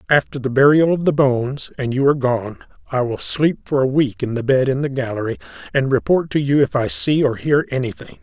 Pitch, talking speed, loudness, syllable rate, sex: 135 Hz, 235 wpm, -18 LUFS, 5.7 syllables/s, male